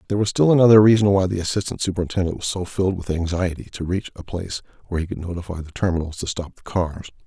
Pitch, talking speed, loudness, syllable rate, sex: 90 Hz, 230 wpm, -21 LUFS, 7.1 syllables/s, male